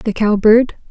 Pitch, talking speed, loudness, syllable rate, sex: 220 Hz, 200 wpm, -13 LUFS, 3.9 syllables/s, female